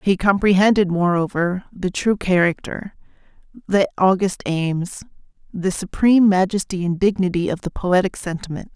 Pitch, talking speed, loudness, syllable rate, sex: 185 Hz, 125 wpm, -19 LUFS, 4.7 syllables/s, female